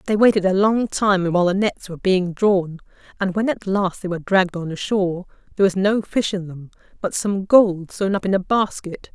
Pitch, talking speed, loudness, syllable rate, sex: 190 Hz, 225 wpm, -20 LUFS, 5.3 syllables/s, female